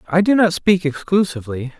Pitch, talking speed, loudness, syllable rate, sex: 170 Hz, 165 wpm, -17 LUFS, 5.6 syllables/s, male